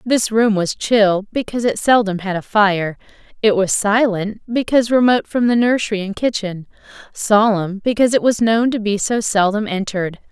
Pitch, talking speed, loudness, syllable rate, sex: 210 Hz, 175 wpm, -17 LUFS, 5.2 syllables/s, female